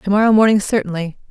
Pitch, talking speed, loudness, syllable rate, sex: 200 Hz, 140 wpm, -15 LUFS, 6.8 syllables/s, female